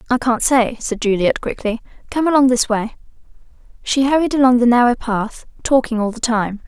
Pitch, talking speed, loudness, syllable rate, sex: 240 Hz, 180 wpm, -17 LUFS, 5.3 syllables/s, female